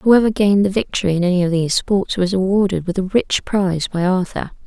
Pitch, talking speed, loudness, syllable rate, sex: 190 Hz, 220 wpm, -17 LUFS, 6.0 syllables/s, female